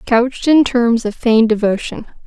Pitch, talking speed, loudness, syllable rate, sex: 235 Hz, 160 wpm, -14 LUFS, 5.1 syllables/s, female